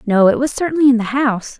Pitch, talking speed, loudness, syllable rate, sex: 245 Hz, 265 wpm, -15 LUFS, 6.8 syllables/s, female